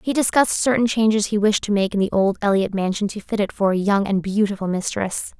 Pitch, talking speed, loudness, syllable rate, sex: 205 Hz, 245 wpm, -20 LUFS, 6.0 syllables/s, female